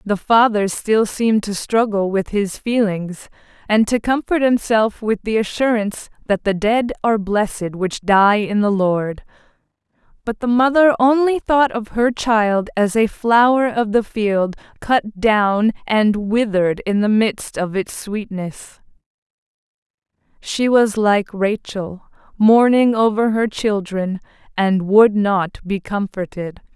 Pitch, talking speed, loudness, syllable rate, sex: 215 Hz, 140 wpm, -17 LUFS, 3.9 syllables/s, female